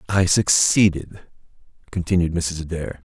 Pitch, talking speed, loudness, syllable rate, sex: 85 Hz, 95 wpm, -19 LUFS, 4.4 syllables/s, male